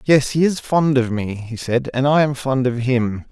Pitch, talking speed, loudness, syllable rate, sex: 130 Hz, 255 wpm, -19 LUFS, 4.4 syllables/s, male